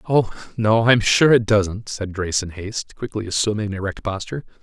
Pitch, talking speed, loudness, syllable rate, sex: 105 Hz, 205 wpm, -20 LUFS, 5.9 syllables/s, male